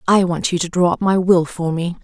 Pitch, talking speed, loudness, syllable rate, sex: 175 Hz, 295 wpm, -17 LUFS, 5.5 syllables/s, female